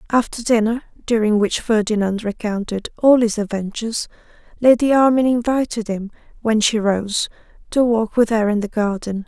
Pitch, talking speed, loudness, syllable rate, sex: 220 Hz, 150 wpm, -18 LUFS, 5.1 syllables/s, female